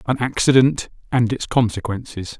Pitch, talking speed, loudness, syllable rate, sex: 115 Hz, 125 wpm, -19 LUFS, 4.9 syllables/s, male